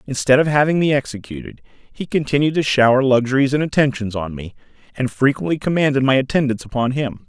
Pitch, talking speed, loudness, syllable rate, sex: 130 Hz, 175 wpm, -17 LUFS, 6.3 syllables/s, male